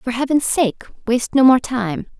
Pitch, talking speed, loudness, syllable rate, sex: 245 Hz, 190 wpm, -17 LUFS, 4.6 syllables/s, female